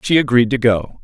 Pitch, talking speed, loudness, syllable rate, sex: 120 Hz, 230 wpm, -15 LUFS, 5.4 syllables/s, male